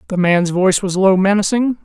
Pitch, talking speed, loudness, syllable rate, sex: 190 Hz, 195 wpm, -15 LUFS, 5.6 syllables/s, male